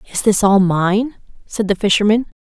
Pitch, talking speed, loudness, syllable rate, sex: 205 Hz, 175 wpm, -15 LUFS, 5.0 syllables/s, female